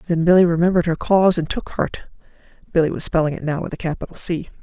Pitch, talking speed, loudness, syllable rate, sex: 170 Hz, 210 wpm, -19 LUFS, 7.0 syllables/s, female